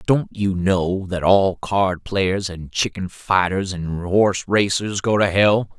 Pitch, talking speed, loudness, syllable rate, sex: 95 Hz, 165 wpm, -19 LUFS, 3.6 syllables/s, male